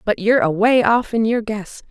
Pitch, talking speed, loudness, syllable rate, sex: 220 Hz, 220 wpm, -17 LUFS, 5.2 syllables/s, female